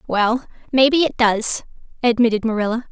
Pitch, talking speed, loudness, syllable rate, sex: 235 Hz, 125 wpm, -18 LUFS, 5.4 syllables/s, female